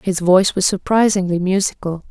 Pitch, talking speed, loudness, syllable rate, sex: 190 Hz, 140 wpm, -16 LUFS, 5.4 syllables/s, female